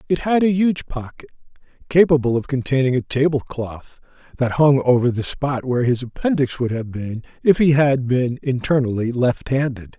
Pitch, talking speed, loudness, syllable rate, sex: 135 Hz, 160 wpm, -19 LUFS, 5.0 syllables/s, male